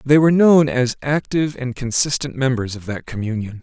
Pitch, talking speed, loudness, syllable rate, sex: 130 Hz, 180 wpm, -18 LUFS, 5.5 syllables/s, male